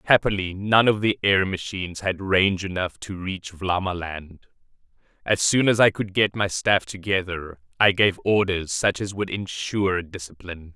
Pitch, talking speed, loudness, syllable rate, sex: 95 Hz, 160 wpm, -22 LUFS, 4.7 syllables/s, male